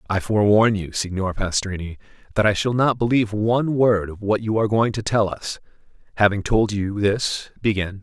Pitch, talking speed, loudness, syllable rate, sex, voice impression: 105 Hz, 185 wpm, -21 LUFS, 5.3 syllables/s, male, very masculine, adult-like, slightly middle-aged, thick, tensed, slightly powerful, bright, slightly hard, clear, fluent, cool, intellectual, very refreshing, sincere, very calm, mature, friendly, reassuring, slightly elegant, sweet, lively, kind